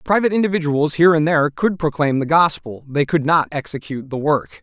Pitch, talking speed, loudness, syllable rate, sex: 155 Hz, 195 wpm, -18 LUFS, 6.1 syllables/s, male